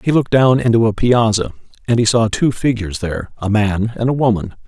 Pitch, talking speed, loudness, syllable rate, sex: 115 Hz, 220 wpm, -16 LUFS, 6.0 syllables/s, male